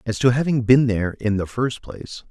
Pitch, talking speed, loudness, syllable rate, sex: 115 Hz, 235 wpm, -20 LUFS, 5.6 syllables/s, male